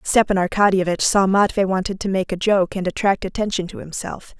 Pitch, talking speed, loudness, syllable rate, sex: 190 Hz, 190 wpm, -19 LUFS, 5.6 syllables/s, female